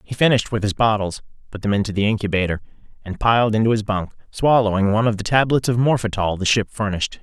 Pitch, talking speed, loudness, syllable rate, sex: 105 Hz, 205 wpm, -19 LUFS, 6.7 syllables/s, male